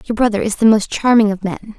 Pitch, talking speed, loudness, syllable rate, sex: 215 Hz, 270 wpm, -15 LUFS, 5.9 syllables/s, female